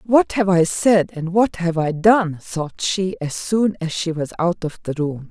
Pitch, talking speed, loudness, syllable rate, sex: 180 Hz, 225 wpm, -19 LUFS, 4.0 syllables/s, female